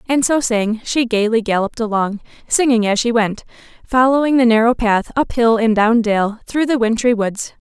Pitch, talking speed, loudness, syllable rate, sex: 230 Hz, 190 wpm, -16 LUFS, 5.0 syllables/s, female